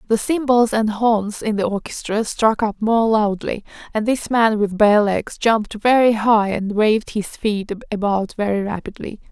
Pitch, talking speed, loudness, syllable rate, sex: 215 Hz, 175 wpm, -18 LUFS, 4.6 syllables/s, female